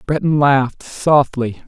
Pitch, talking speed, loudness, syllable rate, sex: 140 Hz, 105 wpm, -16 LUFS, 3.9 syllables/s, male